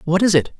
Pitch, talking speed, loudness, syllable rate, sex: 180 Hz, 300 wpm, -16 LUFS, 6.8 syllables/s, male